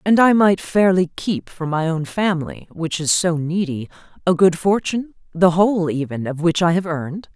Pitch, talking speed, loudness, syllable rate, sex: 170 Hz, 190 wpm, -19 LUFS, 5.0 syllables/s, female